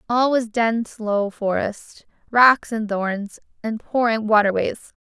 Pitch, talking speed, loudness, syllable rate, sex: 220 Hz, 130 wpm, -20 LUFS, 3.9 syllables/s, female